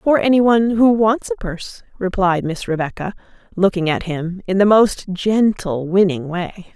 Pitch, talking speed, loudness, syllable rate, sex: 195 Hz, 170 wpm, -17 LUFS, 4.7 syllables/s, female